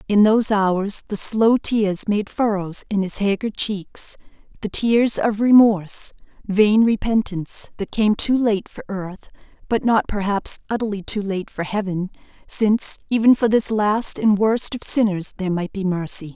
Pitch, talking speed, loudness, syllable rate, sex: 205 Hz, 160 wpm, -19 LUFS, 4.4 syllables/s, female